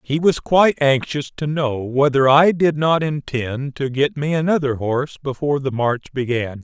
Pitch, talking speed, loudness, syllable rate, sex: 140 Hz, 180 wpm, -19 LUFS, 4.7 syllables/s, male